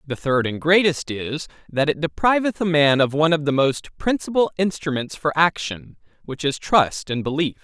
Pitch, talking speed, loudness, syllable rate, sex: 155 Hz, 190 wpm, -20 LUFS, 5.0 syllables/s, male